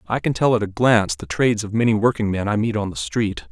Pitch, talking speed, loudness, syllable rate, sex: 105 Hz, 275 wpm, -20 LUFS, 6.2 syllables/s, male